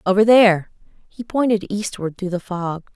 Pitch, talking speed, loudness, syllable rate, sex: 195 Hz, 160 wpm, -19 LUFS, 4.8 syllables/s, female